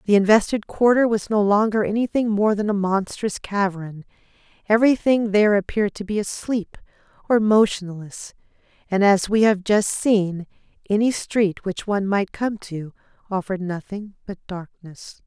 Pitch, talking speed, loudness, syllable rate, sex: 205 Hz, 145 wpm, -20 LUFS, 4.8 syllables/s, female